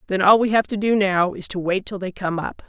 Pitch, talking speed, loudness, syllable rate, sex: 195 Hz, 315 wpm, -20 LUFS, 5.7 syllables/s, female